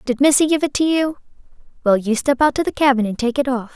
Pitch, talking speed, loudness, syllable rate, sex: 265 Hz, 270 wpm, -18 LUFS, 6.3 syllables/s, female